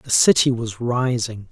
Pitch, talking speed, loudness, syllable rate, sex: 120 Hz, 160 wpm, -19 LUFS, 4.1 syllables/s, male